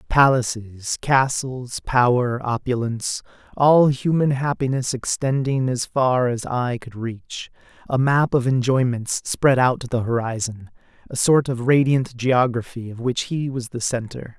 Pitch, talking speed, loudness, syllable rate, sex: 125 Hz, 140 wpm, -21 LUFS, 4.2 syllables/s, male